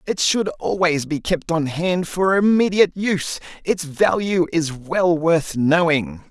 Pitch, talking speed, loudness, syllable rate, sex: 170 Hz, 150 wpm, -19 LUFS, 3.9 syllables/s, male